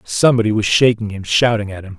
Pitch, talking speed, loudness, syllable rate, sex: 110 Hz, 210 wpm, -15 LUFS, 6.4 syllables/s, male